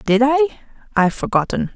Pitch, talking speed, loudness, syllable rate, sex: 245 Hz, 135 wpm, -18 LUFS, 6.9 syllables/s, female